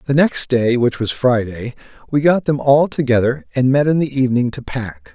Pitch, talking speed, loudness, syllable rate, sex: 125 Hz, 210 wpm, -16 LUFS, 5.1 syllables/s, male